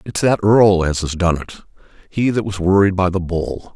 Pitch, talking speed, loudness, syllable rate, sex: 95 Hz, 210 wpm, -17 LUFS, 5.2 syllables/s, male